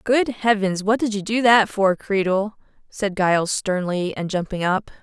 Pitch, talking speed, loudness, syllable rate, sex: 200 Hz, 180 wpm, -20 LUFS, 4.4 syllables/s, female